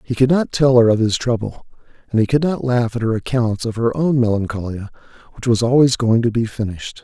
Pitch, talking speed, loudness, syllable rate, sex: 120 Hz, 230 wpm, -17 LUFS, 5.8 syllables/s, male